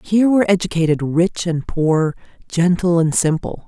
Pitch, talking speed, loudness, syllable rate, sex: 175 Hz, 145 wpm, -17 LUFS, 5.0 syllables/s, female